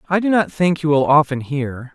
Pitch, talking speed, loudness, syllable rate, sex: 155 Hz, 245 wpm, -17 LUFS, 5.1 syllables/s, male